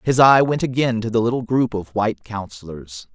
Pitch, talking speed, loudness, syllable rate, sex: 115 Hz, 210 wpm, -19 LUFS, 5.4 syllables/s, male